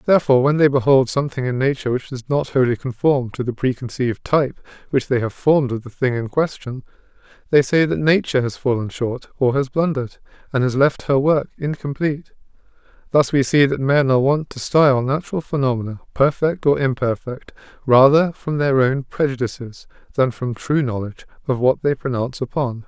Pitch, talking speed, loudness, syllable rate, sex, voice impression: 135 Hz, 180 wpm, -19 LUFS, 5.7 syllables/s, male, masculine, adult-like, thick, tensed, soft, raspy, calm, mature, wild, slightly kind, slightly modest